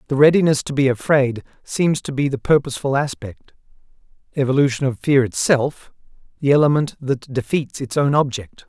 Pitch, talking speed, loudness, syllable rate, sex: 135 Hz, 150 wpm, -19 LUFS, 5.3 syllables/s, male